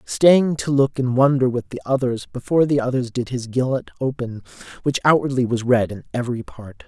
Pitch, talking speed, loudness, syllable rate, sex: 125 Hz, 190 wpm, -20 LUFS, 5.4 syllables/s, male